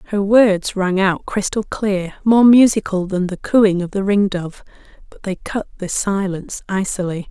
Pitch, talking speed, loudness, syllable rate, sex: 195 Hz, 155 wpm, -17 LUFS, 4.6 syllables/s, female